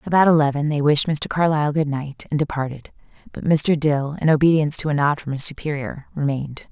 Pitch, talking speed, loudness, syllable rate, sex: 150 Hz, 195 wpm, -20 LUFS, 6.0 syllables/s, female